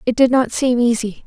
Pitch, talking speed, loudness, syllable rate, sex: 245 Hz, 240 wpm, -16 LUFS, 5.3 syllables/s, female